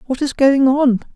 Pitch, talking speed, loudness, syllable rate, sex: 270 Hz, 210 wpm, -15 LUFS, 4.7 syllables/s, female